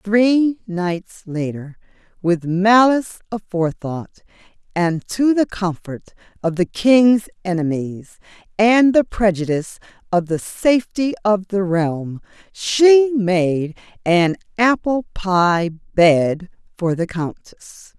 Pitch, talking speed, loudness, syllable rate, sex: 195 Hz, 105 wpm, -18 LUFS, 3.5 syllables/s, female